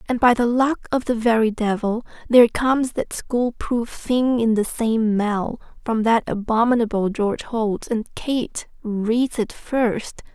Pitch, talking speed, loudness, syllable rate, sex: 230 Hz, 160 wpm, -21 LUFS, 4.0 syllables/s, female